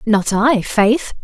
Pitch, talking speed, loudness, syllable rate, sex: 225 Hz, 145 wpm, -15 LUFS, 2.8 syllables/s, female